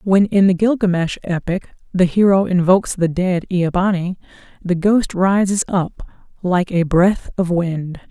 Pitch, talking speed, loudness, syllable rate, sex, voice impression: 185 Hz, 155 wpm, -17 LUFS, 4.3 syllables/s, female, feminine, very adult-like, slightly muffled, calm, sweet, slightly kind